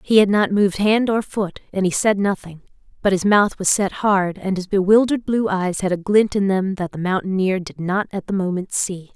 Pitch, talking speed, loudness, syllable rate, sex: 195 Hz, 235 wpm, -19 LUFS, 5.2 syllables/s, female